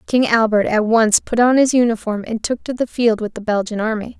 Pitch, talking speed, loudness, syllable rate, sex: 225 Hz, 245 wpm, -17 LUFS, 5.4 syllables/s, female